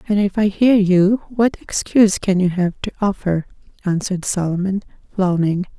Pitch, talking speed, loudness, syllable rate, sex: 190 Hz, 155 wpm, -18 LUFS, 5.0 syllables/s, female